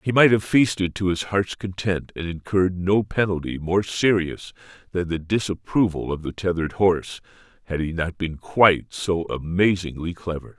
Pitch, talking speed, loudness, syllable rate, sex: 90 Hz, 165 wpm, -22 LUFS, 4.9 syllables/s, male